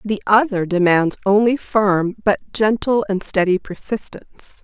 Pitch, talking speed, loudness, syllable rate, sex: 205 Hz, 130 wpm, -18 LUFS, 4.8 syllables/s, female